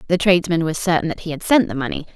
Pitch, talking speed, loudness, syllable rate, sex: 170 Hz, 280 wpm, -19 LUFS, 7.4 syllables/s, female